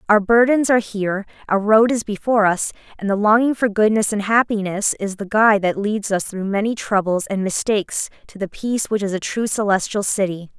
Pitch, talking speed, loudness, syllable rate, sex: 205 Hz, 205 wpm, -19 LUFS, 5.6 syllables/s, female